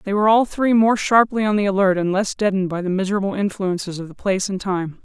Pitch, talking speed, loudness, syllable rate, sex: 195 Hz, 250 wpm, -19 LUFS, 6.4 syllables/s, female